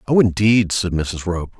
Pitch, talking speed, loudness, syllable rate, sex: 95 Hz, 190 wpm, -18 LUFS, 5.1 syllables/s, male